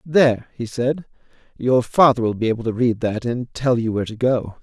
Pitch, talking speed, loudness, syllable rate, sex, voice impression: 120 Hz, 220 wpm, -20 LUFS, 5.3 syllables/s, male, masculine, middle-aged, slightly weak, muffled, halting, slightly calm, slightly mature, friendly, slightly reassuring, kind, slightly modest